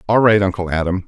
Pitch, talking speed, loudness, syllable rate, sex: 95 Hz, 225 wpm, -16 LUFS, 6.6 syllables/s, male